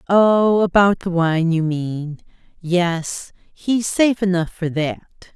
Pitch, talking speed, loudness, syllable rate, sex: 180 Hz, 125 wpm, -18 LUFS, 3.4 syllables/s, female